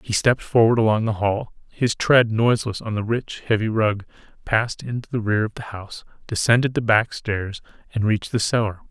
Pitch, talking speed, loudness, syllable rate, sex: 110 Hz, 195 wpm, -21 LUFS, 5.6 syllables/s, male